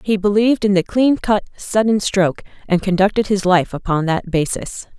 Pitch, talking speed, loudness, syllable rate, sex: 200 Hz, 180 wpm, -17 LUFS, 5.2 syllables/s, female